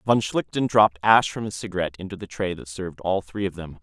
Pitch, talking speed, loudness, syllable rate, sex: 95 Hz, 250 wpm, -23 LUFS, 6.4 syllables/s, male